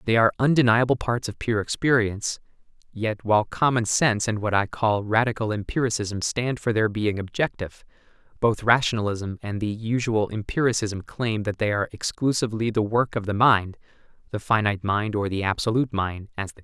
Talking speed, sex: 175 wpm, male